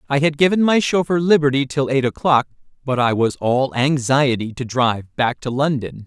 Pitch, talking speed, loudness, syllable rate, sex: 140 Hz, 190 wpm, -18 LUFS, 5.1 syllables/s, male